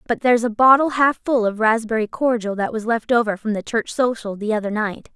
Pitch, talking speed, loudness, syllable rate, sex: 225 Hz, 235 wpm, -19 LUFS, 5.7 syllables/s, female